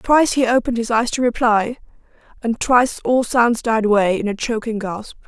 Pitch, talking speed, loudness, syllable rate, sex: 230 Hz, 195 wpm, -18 LUFS, 5.4 syllables/s, female